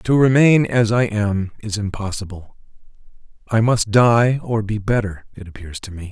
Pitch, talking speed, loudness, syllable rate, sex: 110 Hz, 165 wpm, -18 LUFS, 4.7 syllables/s, male